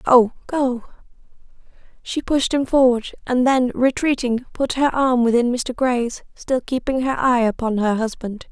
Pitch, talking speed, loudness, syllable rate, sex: 250 Hz, 150 wpm, -19 LUFS, 4.3 syllables/s, female